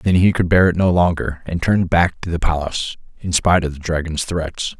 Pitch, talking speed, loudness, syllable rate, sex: 85 Hz, 240 wpm, -18 LUFS, 5.6 syllables/s, male